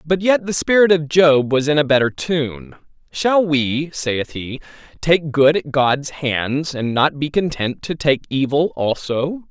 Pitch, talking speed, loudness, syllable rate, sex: 145 Hz, 175 wpm, -18 LUFS, 3.9 syllables/s, male